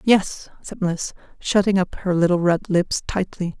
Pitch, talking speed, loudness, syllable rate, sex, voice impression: 185 Hz, 165 wpm, -21 LUFS, 4.2 syllables/s, female, very feminine, very adult-like, middle-aged, relaxed, weak, slightly dark, very soft, very clear, very fluent, cute, very intellectual, refreshing, very sincere, very calm, very friendly, very reassuring, very unique, very elegant, slightly wild, very sweet, slightly lively, very kind, modest